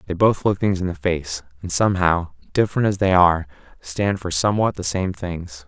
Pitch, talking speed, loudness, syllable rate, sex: 90 Hz, 200 wpm, -20 LUFS, 5.4 syllables/s, male